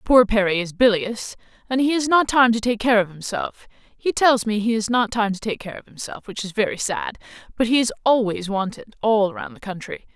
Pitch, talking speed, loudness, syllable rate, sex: 220 Hz, 220 wpm, -21 LUFS, 5.3 syllables/s, female